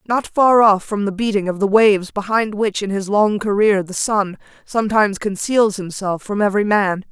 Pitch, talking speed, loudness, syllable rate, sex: 205 Hz, 195 wpm, -17 LUFS, 5.1 syllables/s, female